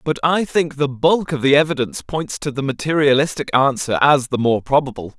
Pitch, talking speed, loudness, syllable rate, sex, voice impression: 140 Hz, 195 wpm, -18 LUFS, 5.4 syllables/s, male, masculine, adult-like, tensed, slightly powerful, bright, clear, fluent, cool, intellectual, refreshing, friendly, lively, kind